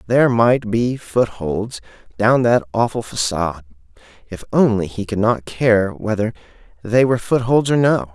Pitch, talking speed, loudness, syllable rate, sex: 110 Hz, 145 wpm, -18 LUFS, 4.6 syllables/s, male